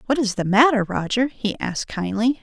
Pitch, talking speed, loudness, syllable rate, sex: 220 Hz, 200 wpm, -21 LUFS, 5.3 syllables/s, female